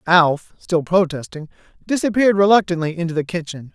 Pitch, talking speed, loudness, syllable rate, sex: 175 Hz, 130 wpm, -18 LUFS, 5.6 syllables/s, male